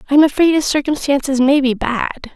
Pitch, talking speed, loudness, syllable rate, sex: 280 Hz, 205 wpm, -15 LUFS, 6.3 syllables/s, female